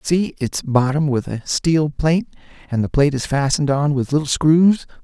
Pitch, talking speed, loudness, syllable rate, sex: 145 Hz, 190 wpm, -18 LUFS, 5.3 syllables/s, male